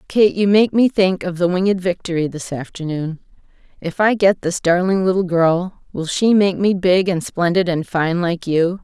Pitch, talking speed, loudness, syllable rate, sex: 180 Hz, 195 wpm, -17 LUFS, 4.7 syllables/s, female